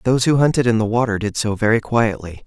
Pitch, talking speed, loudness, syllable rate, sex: 115 Hz, 245 wpm, -18 LUFS, 6.4 syllables/s, male